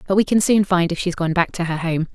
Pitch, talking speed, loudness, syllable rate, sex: 180 Hz, 335 wpm, -19 LUFS, 6.1 syllables/s, female